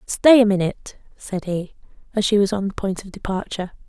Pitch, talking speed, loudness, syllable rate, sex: 200 Hz, 200 wpm, -20 LUFS, 5.8 syllables/s, female